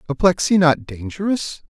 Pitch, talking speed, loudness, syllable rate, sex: 160 Hz, 105 wpm, -18 LUFS, 5.2 syllables/s, male